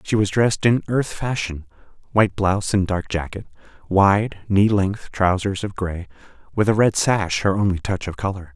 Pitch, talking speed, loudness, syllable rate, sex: 100 Hz, 175 wpm, -20 LUFS, 4.9 syllables/s, male